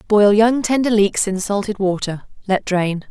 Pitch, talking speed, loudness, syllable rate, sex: 205 Hz, 175 wpm, -17 LUFS, 4.4 syllables/s, female